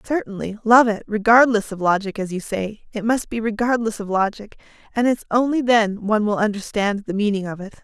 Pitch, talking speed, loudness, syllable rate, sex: 215 Hz, 200 wpm, -20 LUFS, 5.5 syllables/s, female